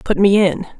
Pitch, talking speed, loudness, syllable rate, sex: 190 Hz, 225 wpm, -14 LUFS, 5.0 syllables/s, female